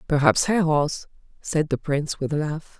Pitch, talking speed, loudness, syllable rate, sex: 155 Hz, 170 wpm, -23 LUFS, 4.8 syllables/s, female